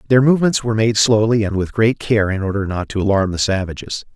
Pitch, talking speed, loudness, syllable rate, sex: 105 Hz, 230 wpm, -17 LUFS, 6.2 syllables/s, male